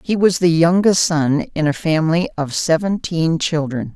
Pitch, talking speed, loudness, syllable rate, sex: 165 Hz, 165 wpm, -17 LUFS, 4.6 syllables/s, female